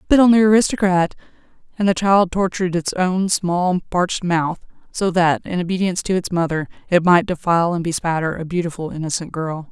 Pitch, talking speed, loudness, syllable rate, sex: 180 Hz, 180 wpm, -18 LUFS, 5.6 syllables/s, female